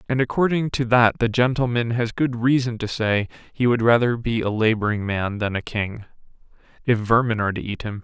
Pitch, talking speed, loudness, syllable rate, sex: 115 Hz, 200 wpm, -21 LUFS, 5.4 syllables/s, male